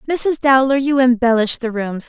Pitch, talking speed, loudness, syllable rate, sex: 255 Hz, 175 wpm, -15 LUFS, 4.9 syllables/s, female